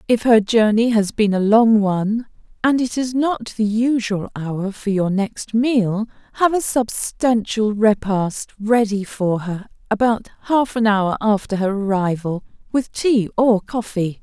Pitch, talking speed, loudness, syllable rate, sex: 215 Hz, 155 wpm, -19 LUFS, 3.9 syllables/s, female